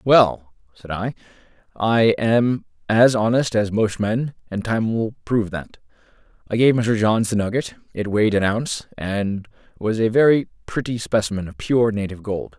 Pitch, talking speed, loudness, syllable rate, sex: 110 Hz, 165 wpm, -20 LUFS, 4.7 syllables/s, male